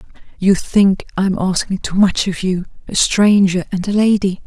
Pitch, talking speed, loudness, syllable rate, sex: 190 Hz, 190 wpm, -16 LUFS, 5.0 syllables/s, female